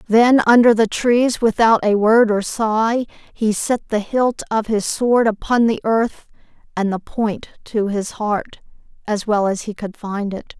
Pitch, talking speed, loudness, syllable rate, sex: 220 Hz, 175 wpm, -18 LUFS, 4.0 syllables/s, female